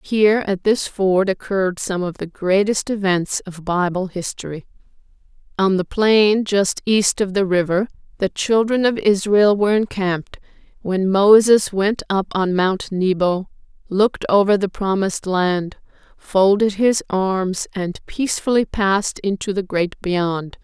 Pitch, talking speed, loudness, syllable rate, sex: 195 Hz, 145 wpm, -18 LUFS, 4.2 syllables/s, female